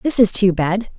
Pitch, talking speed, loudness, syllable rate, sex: 205 Hz, 245 wpm, -16 LUFS, 4.4 syllables/s, female